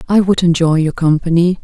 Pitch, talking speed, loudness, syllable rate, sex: 170 Hz, 185 wpm, -13 LUFS, 5.5 syllables/s, female